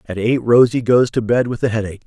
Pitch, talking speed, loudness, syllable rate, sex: 115 Hz, 260 wpm, -16 LUFS, 6.2 syllables/s, male